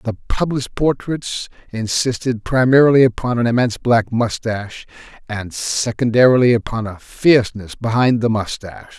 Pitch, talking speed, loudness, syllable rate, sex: 120 Hz, 120 wpm, -17 LUFS, 5.1 syllables/s, male